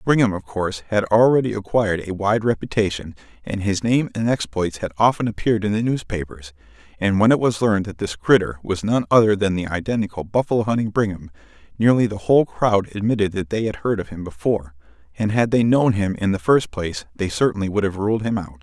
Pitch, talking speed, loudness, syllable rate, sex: 100 Hz, 210 wpm, -20 LUFS, 6.0 syllables/s, male